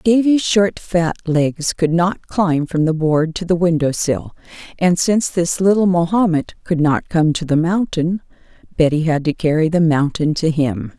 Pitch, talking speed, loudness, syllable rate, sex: 170 Hz, 180 wpm, -17 LUFS, 4.4 syllables/s, female